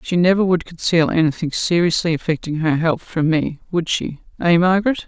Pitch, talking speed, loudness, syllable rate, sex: 165 Hz, 175 wpm, -18 LUFS, 5.4 syllables/s, female